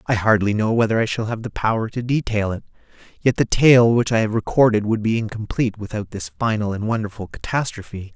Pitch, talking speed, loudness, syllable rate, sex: 110 Hz, 205 wpm, -20 LUFS, 5.9 syllables/s, male